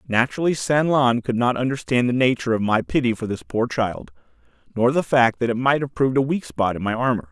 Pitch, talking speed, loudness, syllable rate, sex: 120 Hz, 240 wpm, -21 LUFS, 6.0 syllables/s, male